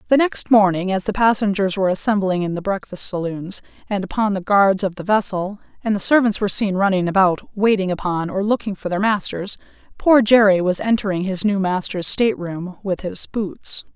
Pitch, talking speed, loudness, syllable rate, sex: 195 Hz, 190 wpm, -19 LUFS, 5.3 syllables/s, female